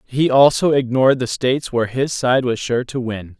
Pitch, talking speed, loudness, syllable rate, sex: 125 Hz, 210 wpm, -17 LUFS, 5.2 syllables/s, male